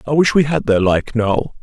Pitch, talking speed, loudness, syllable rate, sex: 125 Hz, 260 wpm, -16 LUFS, 4.9 syllables/s, male